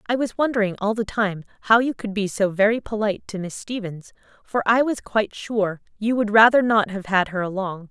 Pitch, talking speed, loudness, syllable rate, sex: 210 Hz, 220 wpm, -21 LUFS, 5.4 syllables/s, female